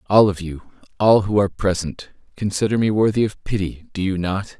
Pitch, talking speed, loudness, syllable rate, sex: 100 Hz, 185 wpm, -20 LUFS, 5.4 syllables/s, male